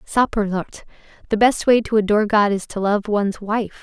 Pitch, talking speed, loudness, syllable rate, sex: 210 Hz, 190 wpm, -19 LUFS, 5.9 syllables/s, female